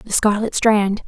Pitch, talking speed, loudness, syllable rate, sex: 210 Hz, 170 wpm, -17 LUFS, 3.9 syllables/s, female